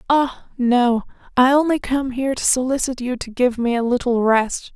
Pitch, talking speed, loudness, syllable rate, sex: 250 Hz, 190 wpm, -19 LUFS, 4.8 syllables/s, female